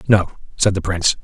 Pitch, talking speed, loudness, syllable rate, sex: 95 Hz, 195 wpm, -18 LUFS, 6.3 syllables/s, male